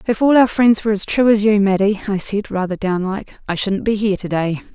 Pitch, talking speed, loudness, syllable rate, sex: 205 Hz, 265 wpm, -17 LUFS, 5.8 syllables/s, female